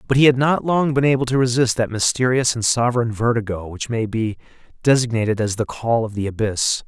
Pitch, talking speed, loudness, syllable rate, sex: 115 Hz, 210 wpm, -19 LUFS, 5.8 syllables/s, male